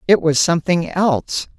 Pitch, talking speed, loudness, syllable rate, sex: 170 Hz, 150 wpm, -17 LUFS, 5.2 syllables/s, female